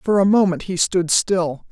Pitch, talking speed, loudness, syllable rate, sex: 180 Hz, 210 wpm, -18 LUFS, 4.5 syllables/s, female